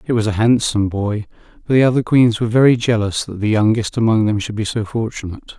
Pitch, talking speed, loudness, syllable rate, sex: 110 Hz, 225 wpm, -16 LUFS, 6.5 syllables/s, male